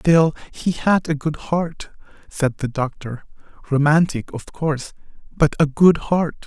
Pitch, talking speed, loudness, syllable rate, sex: 150 Hz, 130 wpm, -20 LUFS, 4.0 syllables/s, male